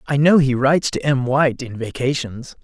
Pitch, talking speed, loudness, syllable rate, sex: 135 Hz, 205 wpm, -18 LUFS, 5.3 syllables/s, male